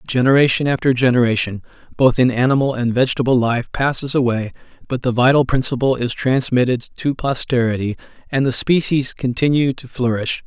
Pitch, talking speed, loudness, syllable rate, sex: 125 Hz, 145 wpm, -17 LUFS, 5.6 syllables/s, male